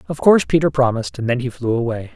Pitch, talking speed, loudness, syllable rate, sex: 120 Hz, 250 wpm, -18 LUFS, 7.1 syllables/s, male